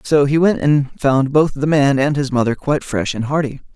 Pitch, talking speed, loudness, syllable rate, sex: 140 Hz, 240 wpm, -16 LUFS, 5.1 syllables/s, male